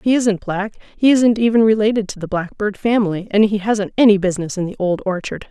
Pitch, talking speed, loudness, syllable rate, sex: 205 Hz, 220 wpm, -17 LUFS, 5.7 syllables/s, female